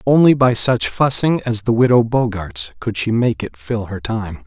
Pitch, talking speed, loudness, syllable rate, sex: 115 Hz, 200 wpm, -16 LUFS, 4.4 syllables/s, male